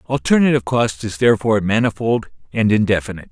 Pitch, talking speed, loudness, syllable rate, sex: 110 Hz, 125 wpm, -17 LUFS, 6.6 syllables/s, male